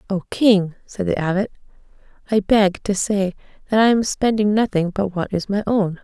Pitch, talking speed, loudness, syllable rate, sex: 200 Hz, 190 wpm, -19 LUFS, 4.9 syllables/s, female